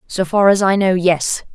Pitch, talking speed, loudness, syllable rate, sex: 185 Hz, 235 wpm, -15 LUFS, 4.4 syllables/s, female